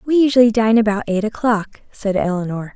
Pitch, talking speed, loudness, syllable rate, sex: 215 Hz, 175 wpm, -17 LUFS, 5.6 syllables/s, female